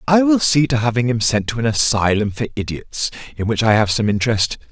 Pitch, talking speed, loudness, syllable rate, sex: 115 Hz, 230 wpm, -17 LUFS, 5.8 syllables/s, male